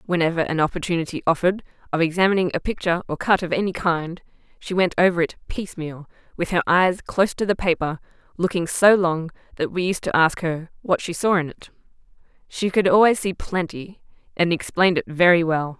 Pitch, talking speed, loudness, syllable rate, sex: 175 Hz, 185 wpm, -21 LUFS, 5.9 syllables/s, female